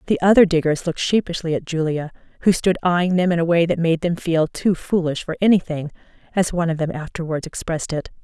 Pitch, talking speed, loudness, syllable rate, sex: 170 Hz, 210 wpm, -20 LUFS, 6.1 syllables/s, female